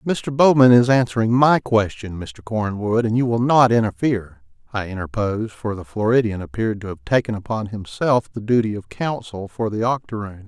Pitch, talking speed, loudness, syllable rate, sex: 110 Hz, 180 wpm, -20 LUFS, 5.4 syllables/s, male